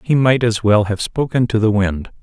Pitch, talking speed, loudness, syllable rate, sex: 110 Hz, 245 wpm, -16 LUFS, 4.9 syllables/s, male